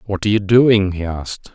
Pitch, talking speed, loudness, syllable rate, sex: 100 Hz, 235 wpm, -16 LUFS, 5.8 syllables/s, male